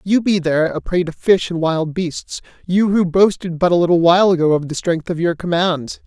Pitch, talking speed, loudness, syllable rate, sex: 175 Hz, 235 wpm, -17 LUFS, 5.3 syllables/s, male